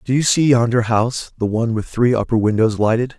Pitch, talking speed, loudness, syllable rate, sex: 115 Hz, 205 wpm, -17 LUFS, 6.1 syllables/s, male